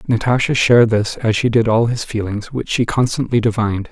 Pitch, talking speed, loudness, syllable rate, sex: 115 Hz, 200 wpm, -16 LUFS, 5.6 syllables/s, male